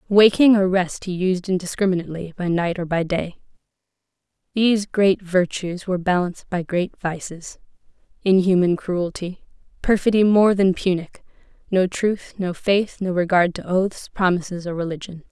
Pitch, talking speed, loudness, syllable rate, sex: 185 Hz, 135 wpm, -20 LUFS, 4.9 syllables/s, female